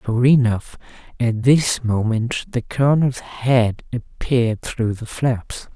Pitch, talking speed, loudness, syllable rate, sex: 120 Hz, 125 wpm, -19 LUFS, 3.6 syllables/s, female